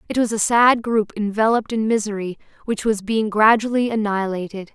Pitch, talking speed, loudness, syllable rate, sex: 215 Hz, 165 wpm, -19 LUFS, 5.6 syllables/s, female